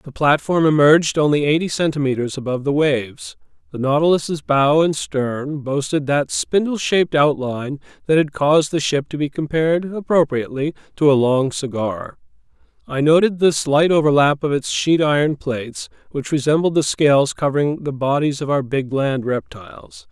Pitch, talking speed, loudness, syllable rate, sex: 145 Hz, 160 wpm, -18 LUFS, 5.1 syllables/s, male